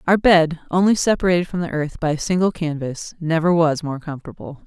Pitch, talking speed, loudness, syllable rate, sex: 165 Hz, 195 wpm, -19 LUFS, 5.8 syllables/s, female